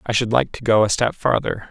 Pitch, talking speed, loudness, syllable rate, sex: 115 Hz, 280 wpm, -19 LUFS, 5.7 syllables/s, male